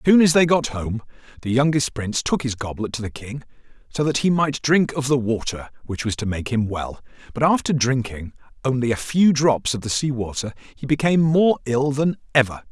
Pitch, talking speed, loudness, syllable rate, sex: 130 Hz, 215 wpm, -21 LUFS, 5.4 syllables/s, male